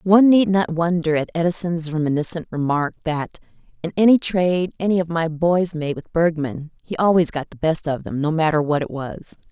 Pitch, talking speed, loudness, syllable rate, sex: 165 Hz, 195 wpm, -20 LUFS, 5.3 syllables/s, female